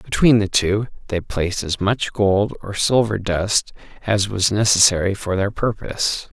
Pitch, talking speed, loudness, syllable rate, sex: 100 Hz, 160 wpm, -19 LUFS, 4.4 syllables/s, male